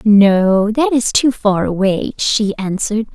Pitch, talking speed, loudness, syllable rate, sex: 215 Hz, 135 wpm, -14 LUFS, 3.8 syllables/s, female